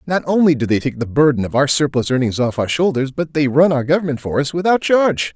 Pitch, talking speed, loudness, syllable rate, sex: 145 Hz, 260 wpm, -16 LUFS, 6.1 syllables/s, male